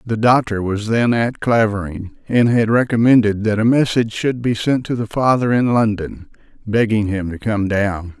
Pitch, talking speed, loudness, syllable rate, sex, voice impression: 110 Hz, 185 wpm, -17 LUFS, 4.7 syllables/s, male, very masculine, slightly middle-aged, slightly muffled, calm, mature, slightly wild